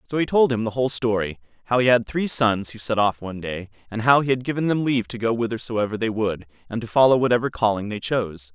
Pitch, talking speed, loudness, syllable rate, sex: 115 Hz, 255 wpm, -22 LUFS, 6.4 syllables/s, male